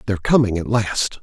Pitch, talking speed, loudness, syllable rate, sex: 105 Hz, 195 wpm, -19 LUFS, 5.6 syllables/s, male